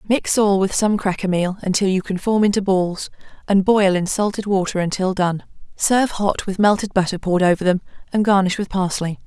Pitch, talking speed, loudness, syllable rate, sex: 195 Hz, 200 wpm, -19 LUFS, 5.5 syllables/s, female